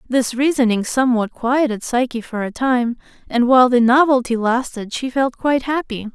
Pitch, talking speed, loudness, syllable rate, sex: 250 Hz, 165 wpm, -17 LUFS, 5.1 syllables/s, female